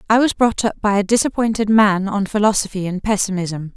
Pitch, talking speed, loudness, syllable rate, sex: 205 Hz, 190 wpm, -17 LUFS, 5.6 syllables/s, female